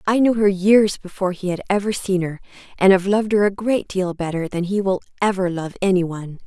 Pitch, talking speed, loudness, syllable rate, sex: 190 Hz, 230 wpm, -20 LUFS, 5.9 syllables/s, female